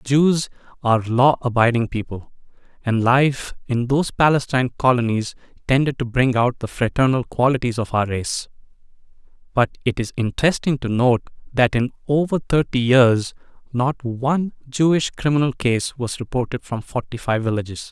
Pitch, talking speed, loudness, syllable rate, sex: 125 Hz, 145 wpm, -20 LUFS, 5.1 syllables/s, male